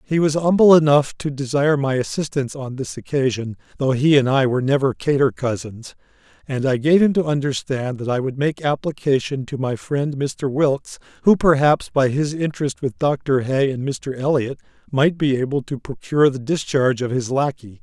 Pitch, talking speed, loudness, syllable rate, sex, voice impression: 140 Hz, 190 wpm, -19 LUFS, 5.2 syllables/s, male, masculine, adult-like, slightly thin, relaxed, soft, raspy, intellectual, friendly, reassuring, kind, modest